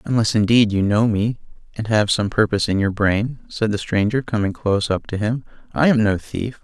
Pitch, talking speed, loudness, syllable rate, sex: 110 Hz, 215 wpm, -19 LUFS, 5.3 syllables/s, male